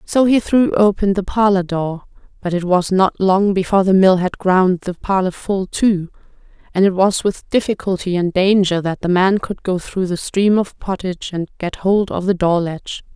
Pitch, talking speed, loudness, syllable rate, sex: 190 Hz, 205 wpm, -17 LUFS, 4.8 syllables/s, female